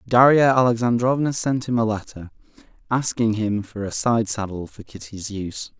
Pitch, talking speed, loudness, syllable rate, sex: 110 Hz, 155 wpm, -21 LUFS, 5.0 syllables/s, male